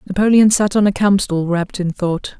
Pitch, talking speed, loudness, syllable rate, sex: 195 Hz, 200 wpm, -15 LUFS, 5.4 syllables/s, female